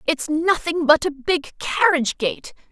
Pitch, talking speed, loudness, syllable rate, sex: 310 Hz, 155 wpm, -20 LUFS, 4.3 syllables/s, female